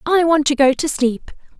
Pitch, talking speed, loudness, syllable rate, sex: 290 Hz, 225 wpm, -16 LUFS, 4.8 syllables/s, female